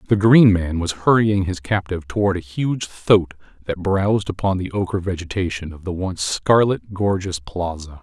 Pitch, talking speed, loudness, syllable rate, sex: 95 Hz, 170 wpm, -20 LUFS, 4.7 syllables/s, male